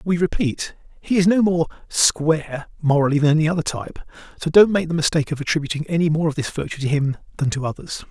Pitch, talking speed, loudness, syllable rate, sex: 155 Hz, 220 wpm, -20 LUFS, 6.6 syllables/s, male